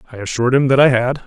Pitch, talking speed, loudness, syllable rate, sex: 130 Hz, 285 wpm, -14 LUFS, 7.8 syllables/s, male